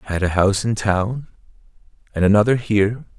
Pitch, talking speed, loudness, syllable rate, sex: 105 Hz, 170 wpm, -18 LUFS, 6.2 syllables/s, male